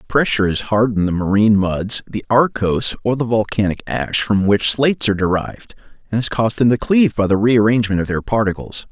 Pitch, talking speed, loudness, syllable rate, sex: 110 Hz, 195 wpm, -17 LUFS, 6.1 syllables/s, male